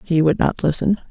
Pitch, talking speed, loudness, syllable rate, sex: 165 Hz, 215 wpm, -18 LUFS, 5.4 syllables/s, female